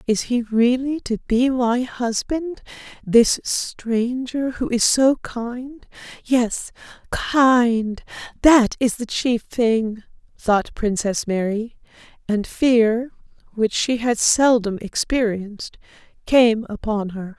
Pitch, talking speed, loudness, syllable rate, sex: 235 Hz, 110 wpm, -20 LUFS, 3.1 syllables/s, female